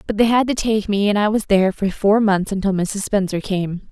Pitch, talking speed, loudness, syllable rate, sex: 205 Hz, 245 wpm, -18 LUFS, 5.1 syllables/s, female